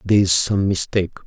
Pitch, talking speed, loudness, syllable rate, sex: 95 Hz, 190 wpm, -18 LUFS, 6.8 syllables/s, male